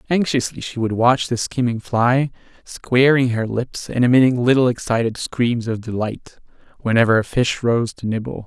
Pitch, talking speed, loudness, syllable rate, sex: 120 Hz, 165 wpm, -19 LUFS, 4.8 syllables/s, male